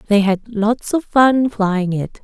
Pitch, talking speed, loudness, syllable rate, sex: 215 Hz, 190 wpm, -17 LUFS, 3.5 syllables/s, female